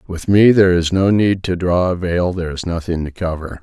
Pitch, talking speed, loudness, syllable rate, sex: 90 Hz, 250 wpm, -16 LUFS, 5.5 syllables/s, male